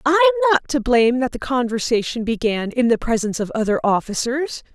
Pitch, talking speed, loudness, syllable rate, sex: 260 Hz, 175 wpm, -19 LUFS, 5.8 syllables/s, female